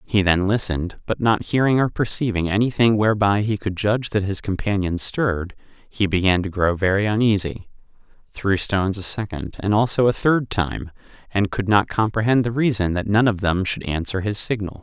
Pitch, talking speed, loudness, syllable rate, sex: 105 Hz, 185 wpm, -20 LUFS, 5.3 syllables/s, male